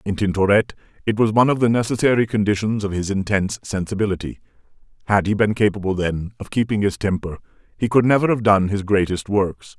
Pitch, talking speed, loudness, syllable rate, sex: 105 Hz, 185 wpm, -20 LUFS, 6.1 syllables/s, male